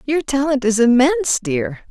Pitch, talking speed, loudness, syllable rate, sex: 260 Hz, 155 wpm, -17 LUFS, 4.7 syllables/s, female